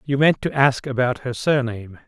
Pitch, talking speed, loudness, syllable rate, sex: 130 Hz, 200 wpm, -20 LUFS, 5.2 syllables/s, male